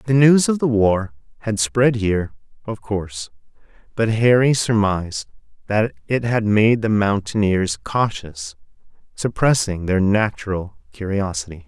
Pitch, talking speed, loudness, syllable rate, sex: 105 Hz, 125 wpm, -19 LUFS, 4.3 syllables/s, male